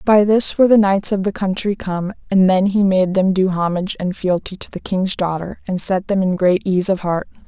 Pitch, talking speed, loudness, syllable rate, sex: 190 Hz, 240 wpm, -17 LUFS, 5.2 syllables/s, female